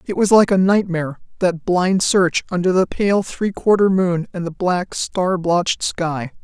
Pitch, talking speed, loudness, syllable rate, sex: 180 Hz, 185 wpm, -18 LUFS, 4.2 syllables/s, female